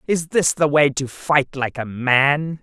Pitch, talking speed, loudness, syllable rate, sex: 145 Hz, 205 wpm, -18 LUFS, 3.6 syllables/s, male